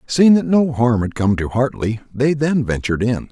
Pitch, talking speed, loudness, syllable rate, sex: 125 Hz, 215 wpm, -17 LUFS, 4.9 syllables/s, male